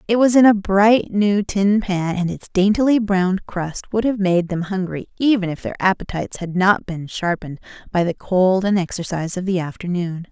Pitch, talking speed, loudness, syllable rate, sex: 190 Hz, 200 wpm, -19 LUFS, 5.1 syllables/s, female